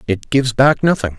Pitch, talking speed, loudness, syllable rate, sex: 125 Hz, 205 wpm, -15 LUFS, 5.8 syllables/s, male